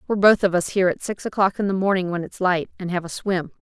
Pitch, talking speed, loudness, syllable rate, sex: 190 Hz, 295 wpm, -21 LUFS, 6.7 syllables/s, female